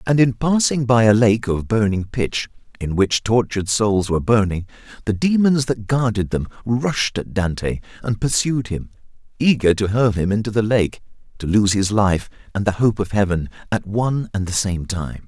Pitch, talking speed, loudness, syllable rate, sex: 110 Hz, 190 wpm, -19 LUFS, 4.8 syllables/s, male